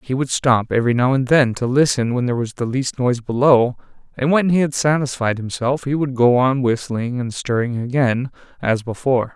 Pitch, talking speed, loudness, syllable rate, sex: 125 Hz, 205 wpm, -18 LUFS, 5.4 syllables/s, male